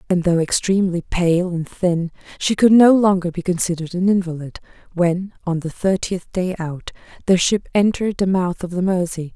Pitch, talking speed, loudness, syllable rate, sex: 180 Hz, 180 wpm, -19 LUFS, 5.1 syllables/s, female